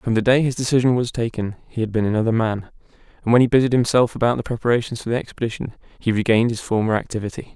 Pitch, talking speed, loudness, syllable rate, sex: 115 Hz, 220 wpm, -20 LUFS, 7.2 syllables/s, male